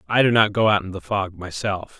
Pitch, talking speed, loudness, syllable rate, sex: 100 Hz, 270 wpm, -21 LUFS, 5.4 syllables/s, male